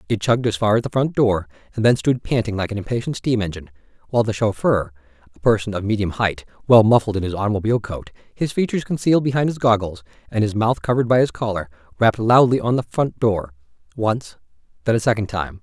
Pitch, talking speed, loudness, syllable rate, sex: 110 Hz, 210 wpm, -20 LUFS, 6.5 syllables/s, male